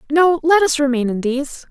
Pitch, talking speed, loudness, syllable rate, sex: 290 Hz, 210 wpm, -16 LUFS, 5.6 syllables/s, female